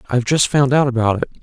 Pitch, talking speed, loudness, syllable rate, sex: 130 Hz, 295 wpm, -16 LUFS, 7.1 syllables/s, male